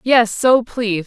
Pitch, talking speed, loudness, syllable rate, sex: 230 Hz, 170 wpm, -16 LUFS, 3.9 syllables/s, female